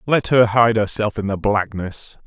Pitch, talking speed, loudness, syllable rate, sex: 110 Hz, 185 wpm, -18 LUFS, 4.4 syllables/s, male